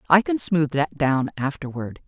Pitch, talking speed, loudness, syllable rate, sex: 150 Hz, 175 wpm, -22 LUFS, 4.5 syllables/s, female